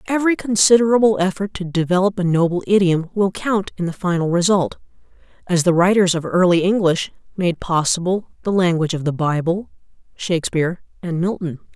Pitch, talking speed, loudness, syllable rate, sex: 180 Hz, 155 wpm, -18 LUFS, 5.7 syllables/s, female